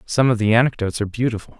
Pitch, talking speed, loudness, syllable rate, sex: 115 Hz, 225 wpm, -19 LUFS, 8.2 syllables/s, male